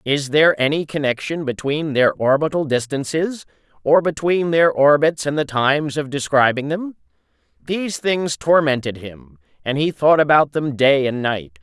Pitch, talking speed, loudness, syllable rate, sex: 145 Hz, 155 wpm, -18 LUFS, 4.7 syllables/s, male